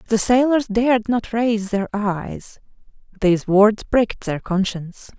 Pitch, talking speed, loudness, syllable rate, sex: 215 Hz, 140 wpm, -19 LUFS, 4.3 syllables/s, female